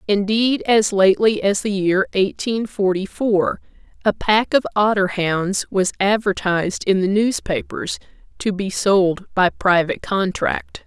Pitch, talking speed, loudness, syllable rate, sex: 200 Hz, 140 wpm, -19 LUFS, 4.1 syllables/s, female